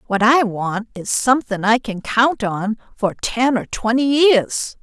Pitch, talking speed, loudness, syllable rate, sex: 230 Hz, 175 wpm, -18 LUFS, 3.8 syllables/s, female